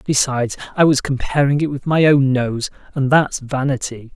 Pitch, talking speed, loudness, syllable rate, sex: 135 Hz, 175 wpm, -17 LUFS, 5.0 syllables/s, male